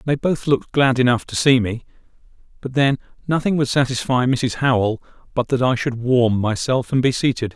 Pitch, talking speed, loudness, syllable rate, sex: 125 Hz, 190 wpm, -19 LUFS, 5.3 syllables/s, male